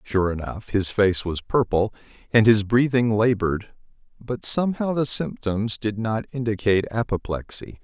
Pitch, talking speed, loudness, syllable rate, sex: 110 Hz, 140 wpm, -22 LUFS, 4.7 syllables/s, male